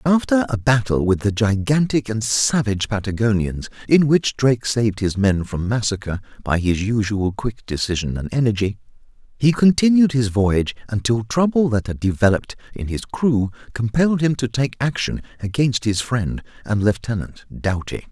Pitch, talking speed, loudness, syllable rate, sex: 115 Hz, 155 wpm, -20 LUFS, 5.0 syllables/s, male